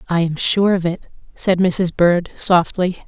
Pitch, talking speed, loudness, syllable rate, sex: 180 Hz, 175 wpm, -17 LUFS, 4.1 syllables/s, female